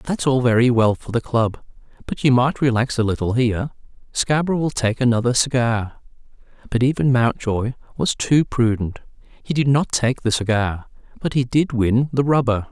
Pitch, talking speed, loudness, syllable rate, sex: 125 Hz, 175 wpm, -19 LUFS, 5.0 syllables/s, male